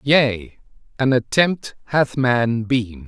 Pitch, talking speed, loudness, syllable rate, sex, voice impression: 120 Hz, 115 wpm, -19 LUFS, 2.9 syllables/s, male, very masculine, middle-aged, thick, slightly relaxed, slightly powerful, bright, slightly soft, clear, fluent, slightly raspy, cool, intellectual, refreshing, very sincere, very calm, friendly, reassuring, slightly unique, elegant, slightly wild, slightly sweet, lively, kind, slightly intense, slightly modest